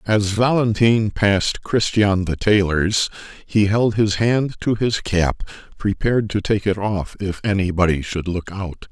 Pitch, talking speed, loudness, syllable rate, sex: 100 Hz, 155 wpm, -19 LUFS, 4.3 syllables/s, male